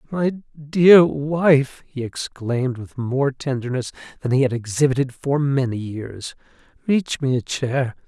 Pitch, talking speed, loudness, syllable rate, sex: 135 Hz, 140 wpm, -20 LUFS, 4.0 syllables/s, male